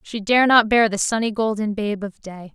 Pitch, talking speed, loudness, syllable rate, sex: 215 Hz, 210 wpm, -19 LUFS, 4.9 syllables/s, female